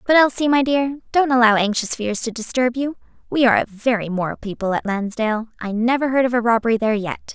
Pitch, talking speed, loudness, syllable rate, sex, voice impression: 235 Hz, 220 wpm, -19 LUFS, 6.2 syllables/s, female, very feminine, gender-neutral, very young, very thin, tensed, slightly weak, very bright, very hard, very clear, very fluent, slightly raspy, very cute, very intellectual, refreshing, sincere, slightly calm, very friendly, very reassuring, very unique, elegant, very sweet, very lively, very kind, slightly sharp, very light